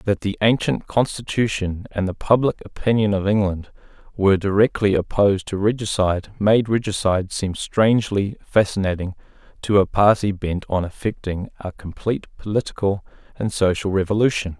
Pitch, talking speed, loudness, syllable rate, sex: 100 Hz, 130 wpm, -20 LUFS, 5.2 syllables/s, male